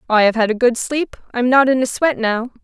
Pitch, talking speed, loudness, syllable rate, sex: 245 Hz, 275 wpm, -16 LUFS, 5.3 syllables/s, female